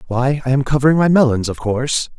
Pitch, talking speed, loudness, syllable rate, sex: 130 Hz, 220 wpm, -16 LUFS, 6.3 syllables/s, male